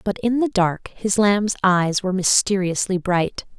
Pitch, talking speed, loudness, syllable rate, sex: 195 Hz, 165 wpm, -20 LUFS, 4.3 syllables/s, female